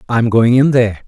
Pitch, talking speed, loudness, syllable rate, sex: 120 Hz, 225 wpm, -12 LUFS, 6.1 syllables/s, male